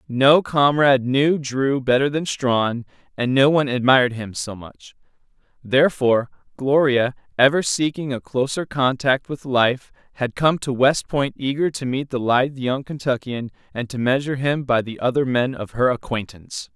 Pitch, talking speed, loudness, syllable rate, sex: 130 Hz, 165 wpm, -20 LUFS, 4.8 syllables/s, male